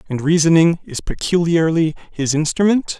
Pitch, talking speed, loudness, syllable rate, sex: 165 Hz, 120 wpm, -17 LUFS, 5.0 syllables/s, male